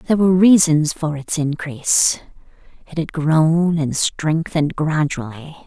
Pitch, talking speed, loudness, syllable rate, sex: 155 Hz, 125 wpm, -17 LUFS, 4.4 syllables/s, female